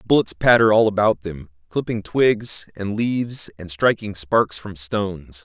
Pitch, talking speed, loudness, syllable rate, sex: 100 Hz, 155 wpm, -20 LUFS, 4.5 syllables/s, male